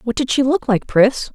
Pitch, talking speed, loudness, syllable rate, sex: 245 Hz, 270 wpm, -16 LUFS, 4.6 syllables/s, female